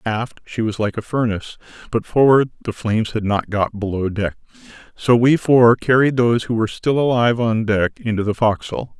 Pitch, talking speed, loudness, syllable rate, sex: 115 Hz, 195 wpm, -18 LUFS, 5.2 syllables/s, male